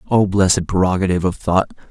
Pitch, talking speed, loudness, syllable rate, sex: 95 Hz, 155 wpm, -17 LUFS, 6.8 syllables/s, male